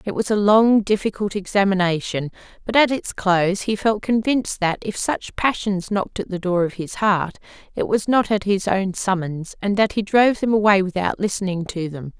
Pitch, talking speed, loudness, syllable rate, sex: 200 Hz, 200 wpm, -20 LUFS, 5.1 syllables/s, female